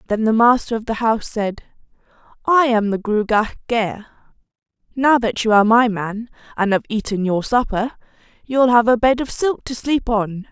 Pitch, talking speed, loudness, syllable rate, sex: 225 Hz, 185 wpm, -18 LUFS, 4.9 syllables/s, female